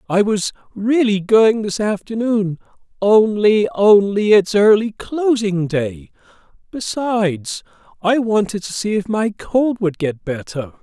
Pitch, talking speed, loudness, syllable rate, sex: 205 Hz, 120 wpm, -17 LUFS, 3.8 syllables/s, male